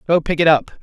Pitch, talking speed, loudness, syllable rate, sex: 160 Hz, 290 wpm, -16 LUFS, 6.3 syllables/s, male